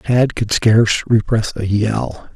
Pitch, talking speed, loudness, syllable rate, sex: 110 Hz, 155 wpm, -16 LUFS, 3.8 syllables/s, male